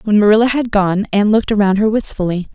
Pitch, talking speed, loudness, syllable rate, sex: 210 Hz, 210 wpm, -14 LUFS, 6.8 syllables/s, female